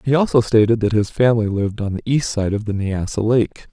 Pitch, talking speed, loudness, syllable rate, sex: 110 Hz, 240 wpm, -18 LUFS, 5.9 syllables/s, male